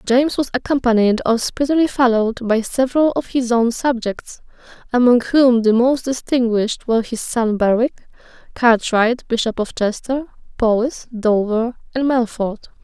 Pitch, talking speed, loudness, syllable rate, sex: 240 Hz, 135 wpm, -17 LUFS, 4.9 syllables/s, female